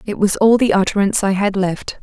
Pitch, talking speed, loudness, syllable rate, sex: 200 Hz, 235 wpm, -16 LUFS, 5.8 syllables/s, female